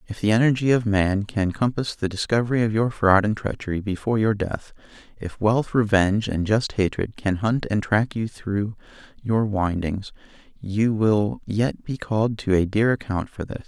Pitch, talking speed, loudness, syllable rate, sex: 105 Hz, 185 wpm, -23 LUFS, 4.8 syllables/s, male